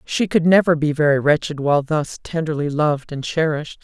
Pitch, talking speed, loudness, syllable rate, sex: 155 Hz, 190 wpm, -19 LUFS, 5.7 syllables/s, female